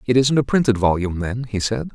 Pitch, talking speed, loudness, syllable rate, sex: 115 Hz, 245 wpm, -19 LUFS, 6.1 syllables/s, male